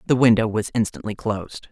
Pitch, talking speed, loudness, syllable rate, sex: 110 Hz, 175 wpm, -21 LUFS, 5.9 syllables/s, female